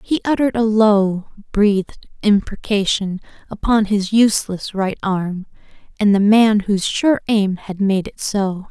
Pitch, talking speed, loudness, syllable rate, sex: 205 Hz, 145 wpm, -17 LUFS, 4.2 syllables/s, female